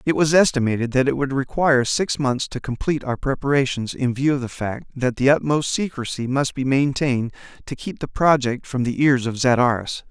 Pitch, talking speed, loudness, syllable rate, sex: 135 Hz, 210 wpm, -21 LUFS, 5.4 syllables/s, male